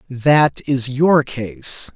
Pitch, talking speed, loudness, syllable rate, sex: 135 Hz, 125 wpm, -16 LUFS, 2.3 syllables/s, male